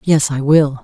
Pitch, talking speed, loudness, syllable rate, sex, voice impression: 145 Hz, 215 wpm, -14 LUFS, 4.2 syllables/s, female, very feminine, very adult-like, thin, slightly tensed, slightly weak, slightly bright, soft, clear, slightly fluent, cool, very intellectual, refreshing, sincere, calm, very friendly, reassuring, unique, very elegant, slightly wild, very sweet, lively, very kind, modest